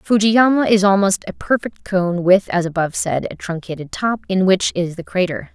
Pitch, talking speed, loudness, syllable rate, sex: 190 Hz, 195 wpm, -18 LUFS, 5.1 syllables/s, female